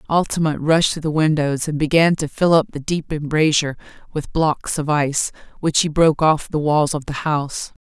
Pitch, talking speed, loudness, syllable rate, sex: 155 Hz, 200 wpm, -19 LUFS, 5.2 syllables/s, female